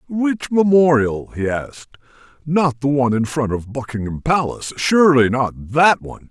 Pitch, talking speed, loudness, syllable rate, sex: 135 Hz, 150 wpm, -17 LUFS, 4.9 syllables/s, male